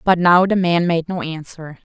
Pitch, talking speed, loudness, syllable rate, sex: 170 Hz, 220 wpm, -17 LUFS, 4.6 syllables/s, female